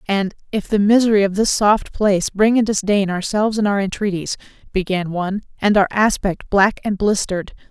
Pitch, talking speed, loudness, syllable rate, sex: 200 Hz, 180 wpm, -18 LUFS, 5.4 syllables/s, female